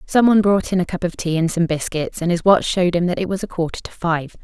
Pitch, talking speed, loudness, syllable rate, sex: 175 Hz, 310 wpm, -19 LUFS, 6.3 syllables/s, female